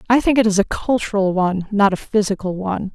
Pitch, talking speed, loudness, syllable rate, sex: 205 Hz, 225 wpm, -18 LUFS, 6.2 syllables/s, female